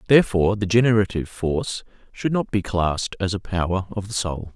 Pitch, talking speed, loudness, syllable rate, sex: 100 Hz, 185 wpm, -22 LUFS, 6.1 syllables/s, male